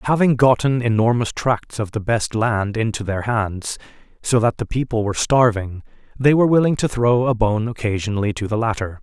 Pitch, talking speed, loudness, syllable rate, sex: 115 Hz, 185 wpm, -19 LUFS, 5.3 syllables/s, male